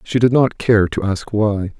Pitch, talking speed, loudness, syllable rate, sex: 105 Hz, 235 wpm, -17 LUFS, 4.2 syllables/s, male